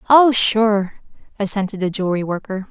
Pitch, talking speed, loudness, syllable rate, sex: 205 Hz, 135 wpm, -18 LUFS, 5.3 syllables/s, female